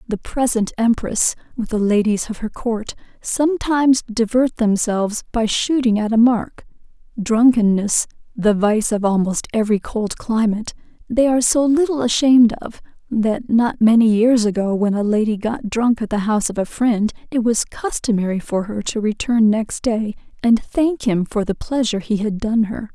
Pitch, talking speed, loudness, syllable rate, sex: 225 Hz, 175 wpm, -18 LUFS, 4.8 syllables/s, female